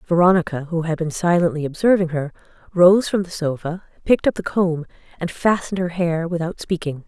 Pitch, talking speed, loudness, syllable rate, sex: 170 Hz, 180 wpm, -20 LUFS, 5.7 syllables/s, female